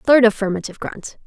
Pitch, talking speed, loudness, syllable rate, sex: 220 Hz, 140 wpm, -19 LUFS, 6.4 syllables/s, female